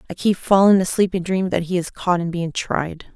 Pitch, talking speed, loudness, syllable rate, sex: 180 Hz, 245 wpm, -19 LUFS, 5.5 syllables/s, female